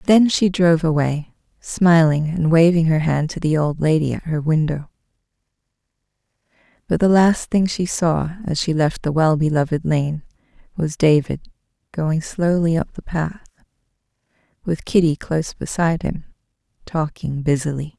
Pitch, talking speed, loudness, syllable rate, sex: 160 Hz, 145 wpm, -19 LUFS, 4.7 syllables/s, female